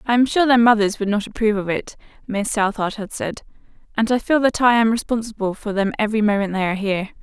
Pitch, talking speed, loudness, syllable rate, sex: 215 Hz, 230 wpm, -19 LUFS, 6.6 syllables/s, female